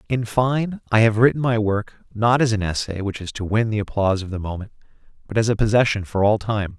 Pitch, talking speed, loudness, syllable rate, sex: 110 Hz, 240 wpm, -20 LUFS, 5.8 syllables/s, male